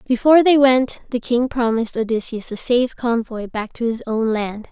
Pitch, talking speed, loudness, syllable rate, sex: 240 Hz, 190 wpm, -18 LUFS, 5.3 syllables/s, female